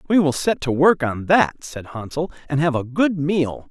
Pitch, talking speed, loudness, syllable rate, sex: 150 Hz, 225 wpm, -20 LUFS, 4.5 syllables/s, male